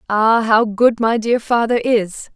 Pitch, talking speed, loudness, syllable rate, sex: 225 Hz, 180 wpm, -16 LUFS, 3.7 syllables/s, female